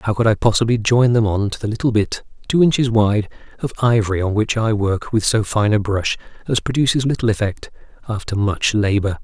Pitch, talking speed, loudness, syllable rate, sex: 110 Hz, 210 wpm, -18 LUFS, 5.5 syllables/s, male